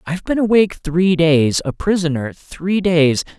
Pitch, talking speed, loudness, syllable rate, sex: 170 Hz, 160 wpm, -16 LUFS, 4.5 syllables/s, male